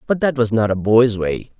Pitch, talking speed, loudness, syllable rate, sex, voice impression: 115 Hz, 265 wpm, -17 LUFS, 5.0 syllables/s, male, masculine, adult-like, tensed, powerful, slightly bright, slightly muffled, fluent, intellectual, friendly, lively, slightly sharp, slightly light